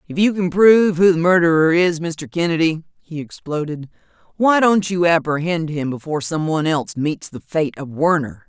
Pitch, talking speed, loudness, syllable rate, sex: 165 Hz, 185 wpm, -17 LUFS, 5.2 syllables/s, female